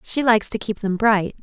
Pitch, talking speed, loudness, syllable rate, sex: 215 Hz, 255 wpm, -19 LUFS, 5.4 syllables/s, female